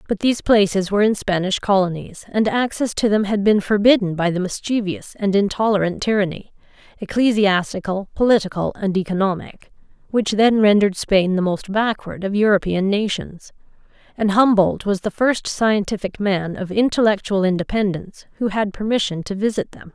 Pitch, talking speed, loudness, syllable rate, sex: 200 Hz, 145 wpm, -19 LUFS, 5.3 syllables/s, female